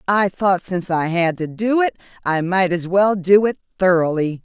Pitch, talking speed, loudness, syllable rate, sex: 185 Hz, 205 wpm, -18 LUFS, 4.8 syllables/s, female